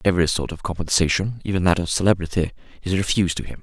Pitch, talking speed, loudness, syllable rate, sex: 90 Hz, 200 wpm, -22 LUFS, 7.1 syllables/s, male